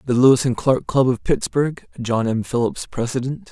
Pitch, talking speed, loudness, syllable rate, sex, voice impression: 125 Hz, 190 wpm, -20 LUFS, 5.0 syllables/s, male, masculine, adult-like, slightly weak, slightly calm, slightly friendly, kind